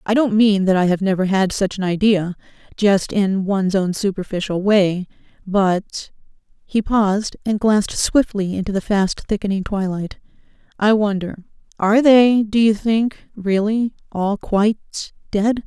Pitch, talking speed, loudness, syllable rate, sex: 200 Hz, 140 wpm, -18 LUFS, 4.5 syllables/s, female